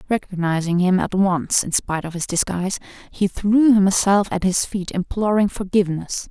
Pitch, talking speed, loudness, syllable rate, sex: 190 Hz, 160 wpm, -19 LUFS, 5.0 syllables/s, female